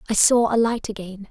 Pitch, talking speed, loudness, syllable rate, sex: 215 Hz, 230 wpm, -19 LUFS, 5.5 syllables/s, female